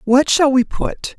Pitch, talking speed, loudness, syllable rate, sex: 270 Hz, 205 wpm, -16 LUFS, 3.8 syllables/s, female